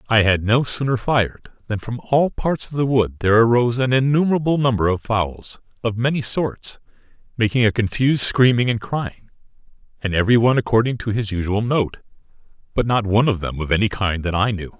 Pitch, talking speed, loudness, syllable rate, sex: 115 Hz, 190 wpm, -19 LUFS, 5.7 syllables/s, male